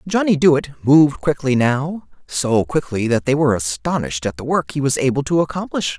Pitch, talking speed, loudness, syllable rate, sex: 140 Hz, 180 wpm, -18 LUFS, 5.4 syllables/s, male